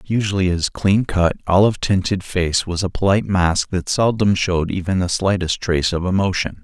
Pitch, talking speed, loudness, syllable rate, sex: 95 Hz, 180 wpm, -18 LUFS, 5.3 syllables/s, male